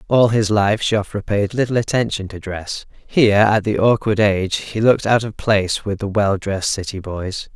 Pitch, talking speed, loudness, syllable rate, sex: 105 Hz, 200 wpm, -18 LUFS, 5.0 syllables/s, male